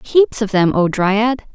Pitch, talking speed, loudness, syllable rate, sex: 220 Hz, 195 wpm, -16 LUFS, 3.6 syllables/s, female